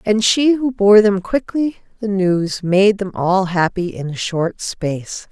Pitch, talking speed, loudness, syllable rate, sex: 200 Hz, 180 wpm, -17 LUFS, 3.8 syllables/s, female